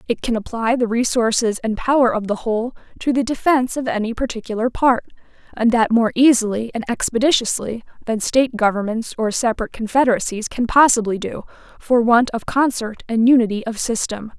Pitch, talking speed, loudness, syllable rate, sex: 235 Hz, 165 wpm, -18 LUFS, 5.7 syllables/s, female